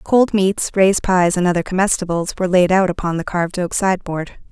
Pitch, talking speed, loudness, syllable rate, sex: 185 Hz, 200 wpm, -17 LUFS, 5.8 syllables/s, female